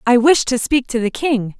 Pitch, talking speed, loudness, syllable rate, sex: 245 Hz, 265 wpm, -16 LUFS, 4.8 syllables/s, female